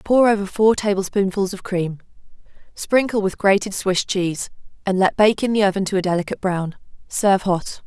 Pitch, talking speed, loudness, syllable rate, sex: 195 Hz, 175 wpm, -20 LUFS, 5.5 syllables/s, female